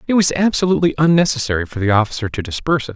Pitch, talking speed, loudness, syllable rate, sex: 140 Hz, 205 wpm, -17 LUFS, 7.9 syllables/s, male